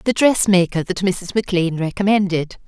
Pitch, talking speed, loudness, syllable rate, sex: 185 Hz, 155 wpm, -18 LUFS, 5.2 syllables/s, female